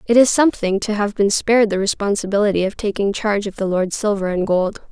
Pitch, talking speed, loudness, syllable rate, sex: 205 Hz, 220 wpm, -18 LUFS, 6.1 syllables/s, female